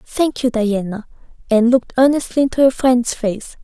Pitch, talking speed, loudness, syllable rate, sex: 240 Hz, 165 wpm, -16 LUFS, 5.3 syllables/s, female